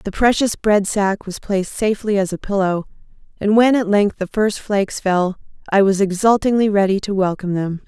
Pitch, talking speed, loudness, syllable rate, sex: 200 Hz, 190 wpm, -18 LUFS, 5.3 syllables/s, female